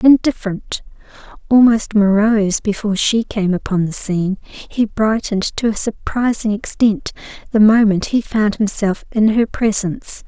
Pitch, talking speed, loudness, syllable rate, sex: 210 Hz, 135 wpm, -16 LUFS, 4.6 syllables/s, female